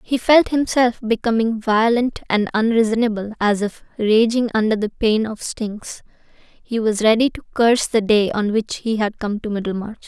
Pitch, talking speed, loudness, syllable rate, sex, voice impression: 220 Hz, 175 wpm, -19 LUFS, 4.7 syllables/s, female, feminine, slightly young, slightly bright, slightly cute, slightly refreshing, friendly